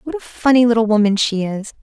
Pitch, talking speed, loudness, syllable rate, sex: 230 Hz, 230 wpm, -16 LUFS, 6.0 syllables/s, female